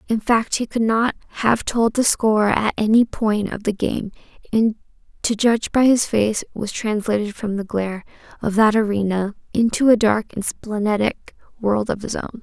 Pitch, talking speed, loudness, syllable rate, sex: 215 Hz, 185 wpm, -20 LUFS, 4.8 syllables/s, female